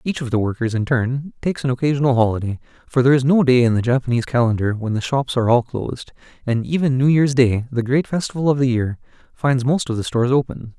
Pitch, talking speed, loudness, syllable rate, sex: 130 Hz, 235 wpm, -19 LUFS, 6.5 syllables/s, male